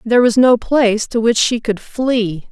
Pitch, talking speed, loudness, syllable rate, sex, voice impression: 230 Hz, 215 wpm, -15 LUFS, 4.6 syllables/s, female, feminine, middle-aged, tensed, powerful, clear, fluent, intellectual, friendly, lively, slightly strict, slightly sharp